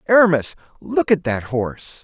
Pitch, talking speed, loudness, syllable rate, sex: 145 Hz, 145 wpm, -19 LUFS, 5.0 syllables/s, male